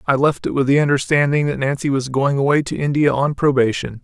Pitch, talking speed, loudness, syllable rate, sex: 140 Hz, 225 wpm, -17 LUFS, 5.9 syllables/s, male